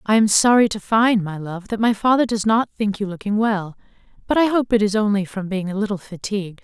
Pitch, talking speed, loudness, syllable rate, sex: 210 Hz, 245 wpm, -19 LUFS, 5.7 syllables/s, female